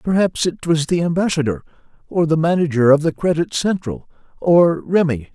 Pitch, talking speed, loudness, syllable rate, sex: 160 Hz, 155 wpm, -17 LUFS, 5.1 syllables/s, male